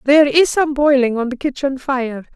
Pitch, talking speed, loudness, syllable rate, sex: 270 Hz, 205 wpm, -16 LUFS, 5.1 syllables/s, female